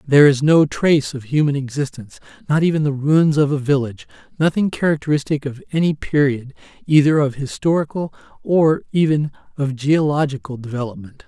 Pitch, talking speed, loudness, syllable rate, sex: 145 Hz, 145 wpm, -18 LUFS, 5.7 syllables/s, male